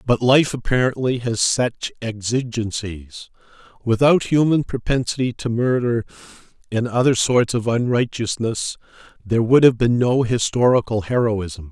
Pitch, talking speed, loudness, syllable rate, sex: 120 Hz, 120 wpm, -19 LUFS, 4.5 syllables/s, male